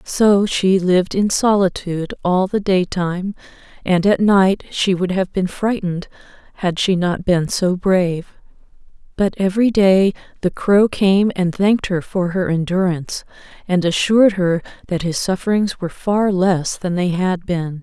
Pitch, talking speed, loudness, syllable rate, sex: 185 Hz, 160 wpm, -17 LUFS, 4.5 syllables/s, female